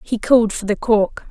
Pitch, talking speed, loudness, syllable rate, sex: 220 Hz, 230 wpm, -17 LUFS, 5.1 syllables/s, female